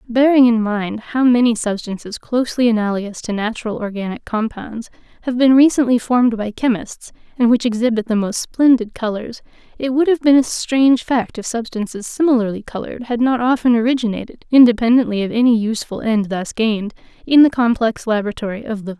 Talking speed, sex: 170 wpm, female